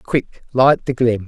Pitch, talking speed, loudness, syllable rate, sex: 125 Hz, 190 wpm, -17 LUFS, 3.5 syllables/s, female